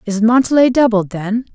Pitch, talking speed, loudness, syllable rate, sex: 225 Hz, 155 wpm, -14 LUFS, 5.1 syllables/s, female